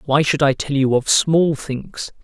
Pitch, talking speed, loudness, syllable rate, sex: 145 Hz, 215 wpm, -17 LUFS, 3.9 syllables/s, male